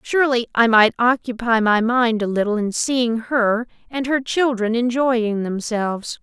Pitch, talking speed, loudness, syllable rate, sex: 235 Hz, 155 wpm, -19 LUFS, 4.3 syllables/s, female